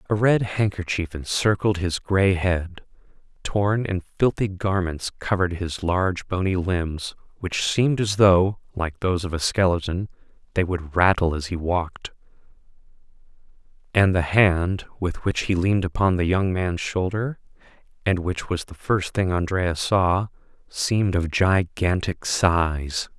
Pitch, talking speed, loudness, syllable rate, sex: 90 Hz, 140 wpm, -23 LUFS, 4.2 syllables/s, male